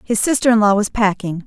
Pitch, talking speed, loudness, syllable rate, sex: 210 Hz, 245 wpm, -16 LUFS, 5.9 syllables/s, female